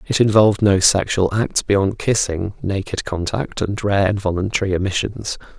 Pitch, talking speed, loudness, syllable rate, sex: 100 Hz, 140 wpm, -18 LUFS, 4.8 syllables/s, male